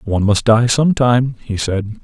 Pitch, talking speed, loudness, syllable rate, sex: 115 Hz, 175 wpm, -15 LUFS, 5.7 syllables/s, male